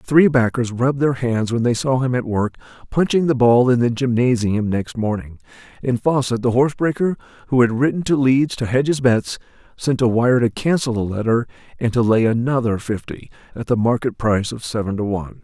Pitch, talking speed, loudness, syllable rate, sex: 120 Hz, 210 wpm, -19 LUFS, 5.6 syllables/s, male